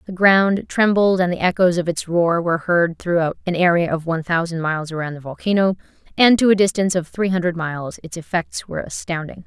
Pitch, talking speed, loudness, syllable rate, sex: 175 Hz, 210 wpm, -19 LUFS, 5.8 syllables/s, female